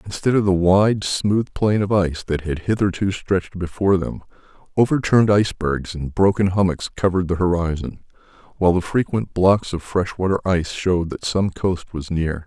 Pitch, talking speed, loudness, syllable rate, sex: 95 Hz, 175 wpm, -20 LUFS, 5.4 syllables/s, male